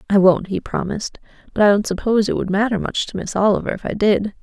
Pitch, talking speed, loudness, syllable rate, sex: 205 Hz, 245 wpm, -19 LUFS, 6.5 syllables/s, female